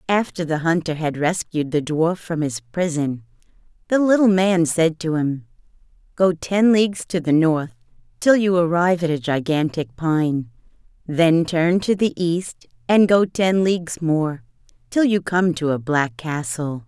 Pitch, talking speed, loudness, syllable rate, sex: 165 Hz, 165 wpm, -20 LUFS, 4.3 syllables/s, female